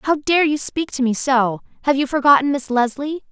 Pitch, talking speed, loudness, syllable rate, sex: 275 Hz, 215 wpm, -18 LUFS, 5.0 syllables/s, female